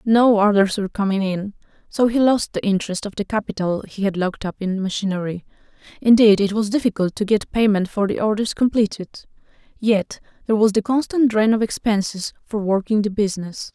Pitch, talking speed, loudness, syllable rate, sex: 210 Hz, 185 wpm, -20 LUFS, 5.7 syllables/s, female